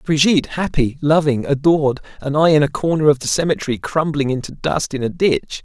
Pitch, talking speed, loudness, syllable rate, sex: 145 Hz, 190 wpm, -17 LUFS, 5.7 syllables/s, male